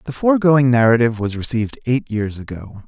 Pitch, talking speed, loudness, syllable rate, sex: 120 Hz, 165 wpm, -17 LUFS, 6.0 syllables/s, male